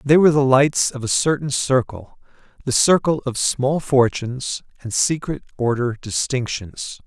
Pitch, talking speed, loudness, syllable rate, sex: 130 Hz, 135 wpm, -19 LUFS, 4.5 syllables/s, male